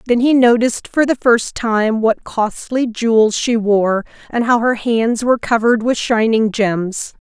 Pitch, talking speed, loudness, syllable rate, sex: 230 Hz, 175 wpm, -15 LUFS, 4.3 syllables/s, female